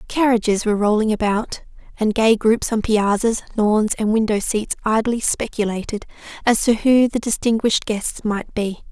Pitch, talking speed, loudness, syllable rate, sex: 220 Hz, 155 wpm, -19 LUFS, 4.8 syllables/s, female